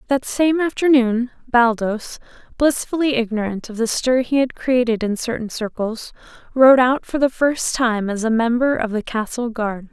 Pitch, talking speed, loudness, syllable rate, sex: 240 Hz, 170 wpm, -19 LUFS, 4.6 syllables/s, female